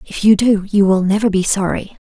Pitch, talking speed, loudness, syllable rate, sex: 200 Hz, 230 wpm, -15 LUFS, 5.4 syllables/s, female